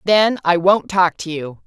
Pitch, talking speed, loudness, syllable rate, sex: 180 Hz, 215 wpm, -16 LUFS, 4.0 syllables/s, female